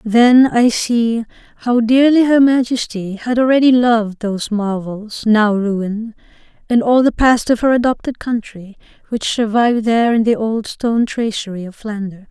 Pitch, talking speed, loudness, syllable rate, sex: 230 Hz, 155 wpm, -15 LUFS, 4.7 syllables/s, female